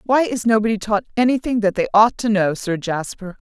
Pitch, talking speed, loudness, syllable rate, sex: 215 Hz, 210 wpm, -18 LUFS, 5.5 syllables/s, female